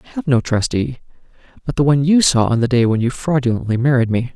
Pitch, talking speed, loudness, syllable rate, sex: 130 Hz, 235 wpm, -16 LUFS, 6.4 syllables/s, male